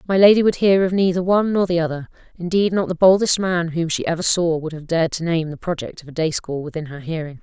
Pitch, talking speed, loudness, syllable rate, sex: 170 Hz, 265 wpm, -19 LUFS, 6.3 syllables/s, female